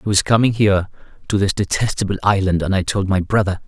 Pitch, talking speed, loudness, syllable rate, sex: 100 Hz, 210 wpm, -18 LUFS, 6.4 syllables/s, male